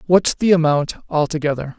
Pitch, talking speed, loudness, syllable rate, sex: 160 Hz, 135 wpm, -18 LUFS, 5.2 syllables/s, male